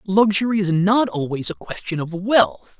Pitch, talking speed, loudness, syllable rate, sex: 195 Hz, 170 wpm, -19 LUFS, 4.5 syllables/s, male